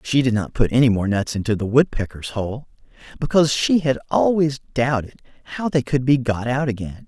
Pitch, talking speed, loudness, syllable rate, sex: 125 Hz, 195 wpm, -20 LUFS, 5.4 syllables/s, male